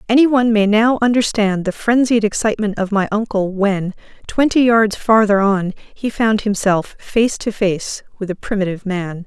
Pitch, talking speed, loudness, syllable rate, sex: 210 Hz, 170 wpm, -16 LUFS, 4.9 syllables/s, female